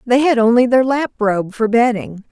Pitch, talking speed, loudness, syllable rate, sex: 235 Hz, 210 wpm, -15 LUFS, 4.8 syllables/s, female